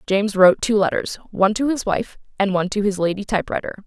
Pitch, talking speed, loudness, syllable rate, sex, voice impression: 200 Hz, 220 wpm, -20 LUFS, 6.8 syllables/s, female, very feminine, adult-like, fluent, slightly intellectual, slightly strict